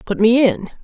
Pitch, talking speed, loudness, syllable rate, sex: 230 Hz, 215 wpm, -15 LUFS, 5.0 syllables/s, female